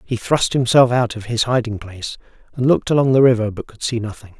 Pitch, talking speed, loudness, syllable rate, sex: 120 Hz, 230 wpm, -17 LUFS, 6.1 syllables/s, male